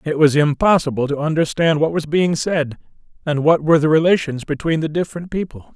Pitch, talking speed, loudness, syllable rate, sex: 155 Hz, 190 wpm, -18 LUFS, 5.8 syllables/s, male